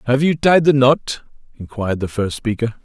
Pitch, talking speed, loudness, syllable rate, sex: 125 Hz, 190 wpm, -17 LUFS, 5.2 syllables/s, male